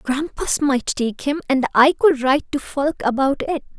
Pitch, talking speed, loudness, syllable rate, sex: 275 Hz, 175 wpm, -19 LUFS, 4.8 syllables/s, female